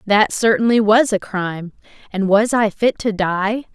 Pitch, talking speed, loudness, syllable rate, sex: 210 Hz, 175 wpm, -17 LUFS, 4.4 syllables/s, female